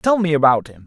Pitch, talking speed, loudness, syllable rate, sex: 155 Hz, 275 wpm, -16 LUFS, 6.0 syllables/s, male